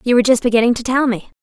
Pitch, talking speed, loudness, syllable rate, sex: 240 Hz, 295 wpm, -15 LUFS, 8.1 syllables/s, female